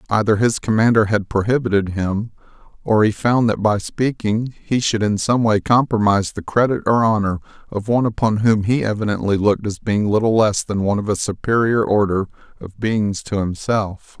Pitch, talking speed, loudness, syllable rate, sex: 105 Hz, 180 wpm, -18 LUFS, 5.3 syllables/s, male